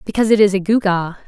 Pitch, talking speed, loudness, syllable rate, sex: 200 Hz, 235 wpm, -15 LUFS, 7.8 syllables/s, female